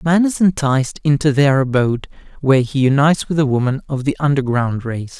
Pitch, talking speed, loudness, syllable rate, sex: 140 Hz, 195 wpm, -16 LUFS, 6.0 syllables/s, male